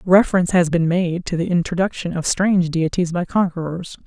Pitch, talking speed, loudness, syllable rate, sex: 175 Hz, 175 wpm, -19 LUFS, 5.6 syllables/s, female